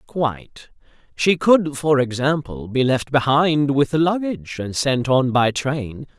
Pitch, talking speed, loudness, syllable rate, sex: 140 Hz, 135 wpm, -19 LUFS, 4.0 syllables/s, male